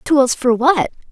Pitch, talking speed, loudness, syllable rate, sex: 265 Hz, 160 wpm, -15 LUFS, 3.6 syllables/s, female